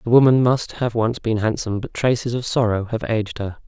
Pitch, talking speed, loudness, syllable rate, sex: 115 Hz, 230 wpm, -20 LUFS, 5.8 syllables/s, male